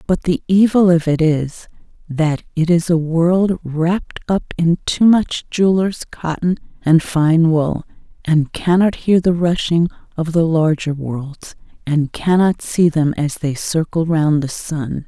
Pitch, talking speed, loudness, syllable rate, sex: 165 Hz, 160 wpm, -16 LUFS, 3.9 syllables/s, female